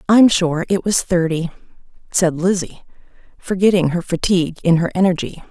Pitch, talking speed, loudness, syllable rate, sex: 180 Hz, 140 wpm, -17 LUFS, 5.1 syllables/s, female